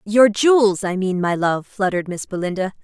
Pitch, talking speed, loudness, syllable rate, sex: 195 Hz, 190 wpm, -18 LUFS, 5.3 syllables/s, female